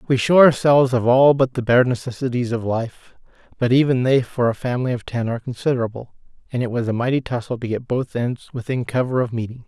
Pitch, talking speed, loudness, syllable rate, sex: 125 Hz, 215 wpm, -19 LUFS, 6.3 syllables/s, male